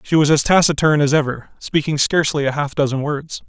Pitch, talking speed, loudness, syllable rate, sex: 145 Hz, 205 wpm, -17 LUFS, 5.8 syllables/s, male